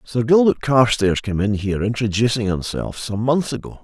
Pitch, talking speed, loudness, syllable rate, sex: 115 Hz, 170 wpm, -19 LUFS, 5.1 syllables/s, male